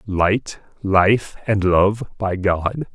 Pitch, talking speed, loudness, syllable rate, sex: 100 Hz, 120 wpm, -19 LUFS, 2.6 syllables/s, male